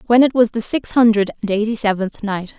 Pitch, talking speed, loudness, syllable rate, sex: 220 Hz, 230 wpm, -17 LUFS, 5.6 syllables/s, female